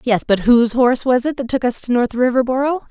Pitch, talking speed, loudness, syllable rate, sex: 245 Hz, 250 wpm, -16 LUFS, 6.1 syllables/s, female